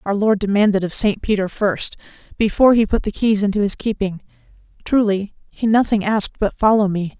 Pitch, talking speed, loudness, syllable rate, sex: 205 Hz, 185 wpm, -18 LUFS, 5.6 syllables/s, female